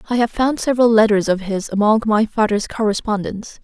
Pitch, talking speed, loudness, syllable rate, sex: 215 Hz, 180 wpm, -17 LUFS, 5.9 syllables/s, female